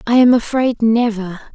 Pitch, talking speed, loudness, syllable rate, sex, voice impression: 230 Hz, 155 wpm, -15 LUFS, 4.3 syllables/s, female, feminine, slightly young, relaxed, weak, soft, raspy, slightly cute, calm, friendly, reassuring, elegant, kind, modest